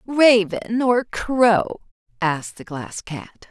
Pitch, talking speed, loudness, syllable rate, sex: 205 Hz, 120 wpm, -20 LUFS, 3.1 syllables/s, female